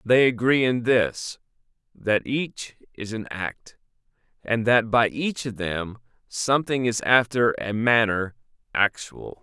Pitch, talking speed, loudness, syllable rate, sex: 115 Hz, 135 wpm, -23 LUFS, 3.7 syllables/s, male